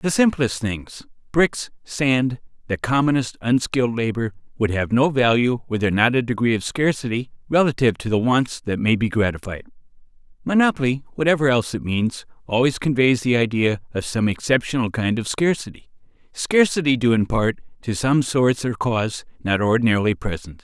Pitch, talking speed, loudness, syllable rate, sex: 120 Hz, 155 wpm, -20 LUFS, 5.4 syllables/s, male